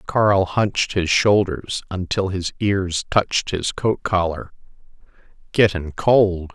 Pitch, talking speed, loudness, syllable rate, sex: 95 Hz, 120 wpm, -20 LUFS, 3.6 syllables/s, male